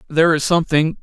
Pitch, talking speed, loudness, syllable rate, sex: 160 Hz, 175 wpm, -16 LUFS, 7.2 syllables/s, male